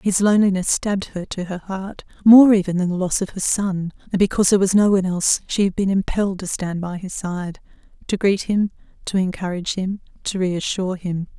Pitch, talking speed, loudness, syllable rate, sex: 190 Hz, 210 wpm, -20 LUFS, 5.8 syllables/s, female